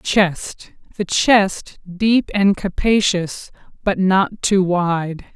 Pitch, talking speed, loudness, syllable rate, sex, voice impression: 190 Hz, 100 wpm, -17 LUFS, 2.6 syllables/s, female, very feminine, very adult-like, middle-aged, slightly thin, very tensed, powerful, bright, very hard, slightly clear, fluent, cool, very intellectual, very sincere, very calm, very reassuring, slightly unique, slightly elegant, wild, strict, slightly sharp